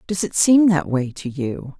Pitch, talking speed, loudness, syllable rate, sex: 165 Hz, 235 wpm, -19 LUFS, 4.3 syllables/s, female